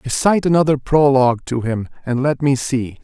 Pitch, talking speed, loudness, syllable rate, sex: 135 Hz, 180 wpm, -17 LUFS, 5.4 syllables/s, male